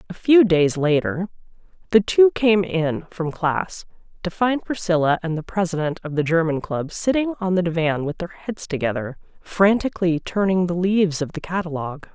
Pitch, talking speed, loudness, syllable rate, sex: 175 Hz, 175 wpm, -21 LUFS, 5.0 syllables/s, female